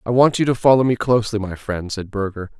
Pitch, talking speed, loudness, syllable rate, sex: 110 Hz, 255 wpm, -19 LUFS, 6.2 syllables/s, male